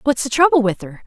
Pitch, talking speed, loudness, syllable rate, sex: 250 Hz, 285 wpm, -16 LUFS, 6.2 syllables/s, female